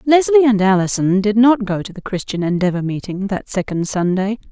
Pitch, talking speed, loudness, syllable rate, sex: 205 Hz, 185 wpm, -17 LUFS, 5.4 syllables/s, female